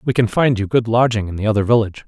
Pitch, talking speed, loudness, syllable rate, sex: 110 Hz, 290 wpm, -17 LUFS, 6.9 syllables/s, male